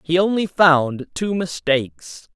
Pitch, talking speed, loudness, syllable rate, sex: 160 Hz, 130 wpm, -19 LUFS, 3.7 syllables/s, male